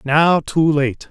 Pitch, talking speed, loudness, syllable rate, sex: 150 Hz, 160 wpm, -16 LUFS, 3.0 syllables/s, male